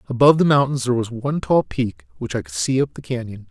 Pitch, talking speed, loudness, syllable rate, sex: 130 Hz, 255 wpm, -20 LUFS, 6.5 syllables/s, male